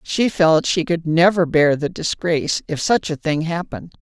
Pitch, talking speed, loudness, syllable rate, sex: 165 Hz, 195 wpm, -18 LUFS, 4.7 syllables/s, female